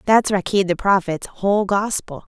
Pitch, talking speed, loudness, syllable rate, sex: 195 Hz, 155 wpm, -19 LUFS, 4.7 syllables/s, female